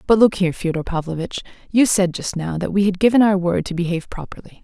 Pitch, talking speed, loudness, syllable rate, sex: 185 Hz, 235 wpm, -19 LUFS, 6.4 syllables/s, female